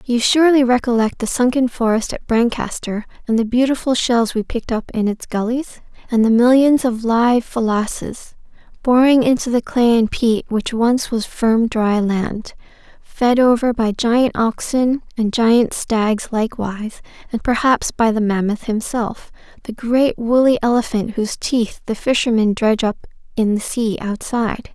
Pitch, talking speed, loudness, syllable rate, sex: 235 Hz, 160 wpm, -17 LUFS, 4.6 syllables/s, female